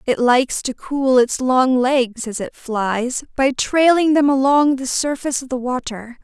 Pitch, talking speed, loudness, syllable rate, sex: 260 Hz, 185 wpm, -18 LUFS, 4.2 syllables/s, female